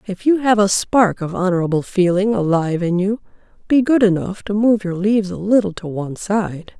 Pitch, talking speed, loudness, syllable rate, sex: 195 Hz, 205 wpm, -17 LUFS, 5.3 syllables/s, female